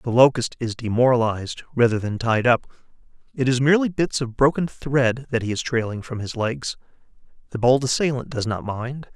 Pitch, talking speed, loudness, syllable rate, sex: 125 Hz, 185 wpm, -22 LUFS, 5.3 syllables/s, male